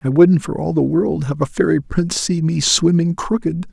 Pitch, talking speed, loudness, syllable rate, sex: 155 Hz, 225 wpm, -17 LUFS, 5.0 syllables/s, male